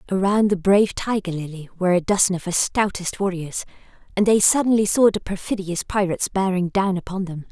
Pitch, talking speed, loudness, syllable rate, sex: 190 Hz, 185 wpm, -21 LUFS, 5.7 syllables/s, female